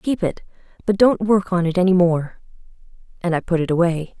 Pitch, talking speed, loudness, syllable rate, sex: 180 Hz, 200 wpm, -19 LUFS, 5.4 syllables/s, female